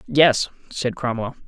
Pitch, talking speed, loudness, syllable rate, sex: 130 Hz, 120 wpm, -21 LUFS, 3.9 syllables/s, male